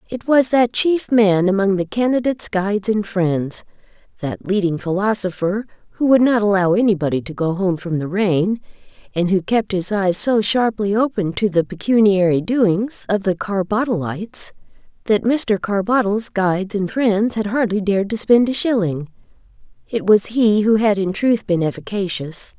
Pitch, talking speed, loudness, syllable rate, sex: 205 Hz, 160 wpm, -18 LUFS, 4.7 syllables/s, female